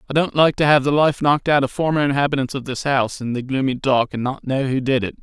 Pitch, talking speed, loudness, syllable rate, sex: 135 Hz, 285 wpm, -19 LUFS, 6.5 syllables/s, male